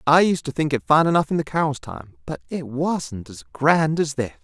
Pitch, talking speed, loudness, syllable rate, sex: 145 Hz, 245 wpm, -21 LUFS, 5.1 syllables/s, male